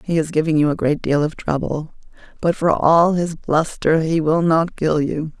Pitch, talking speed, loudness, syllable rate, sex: 160 Hz, 210 wpm, -18 LUFS, 4.6 syllables/s, female